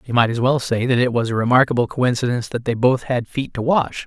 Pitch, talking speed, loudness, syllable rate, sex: 125 Hz, 265 wpm, -19 LUFS, 6.1 syllables/s, male